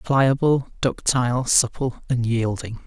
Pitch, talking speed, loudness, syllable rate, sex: 125 Hz, 105 wpm, -21 LUFS, 3.7 syllables/s, male